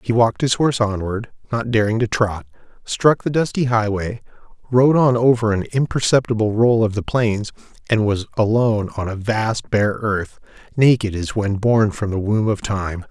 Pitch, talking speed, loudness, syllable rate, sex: 110 Hz, 180 wpm, -19 LUFS, 4.8 syllables/s, male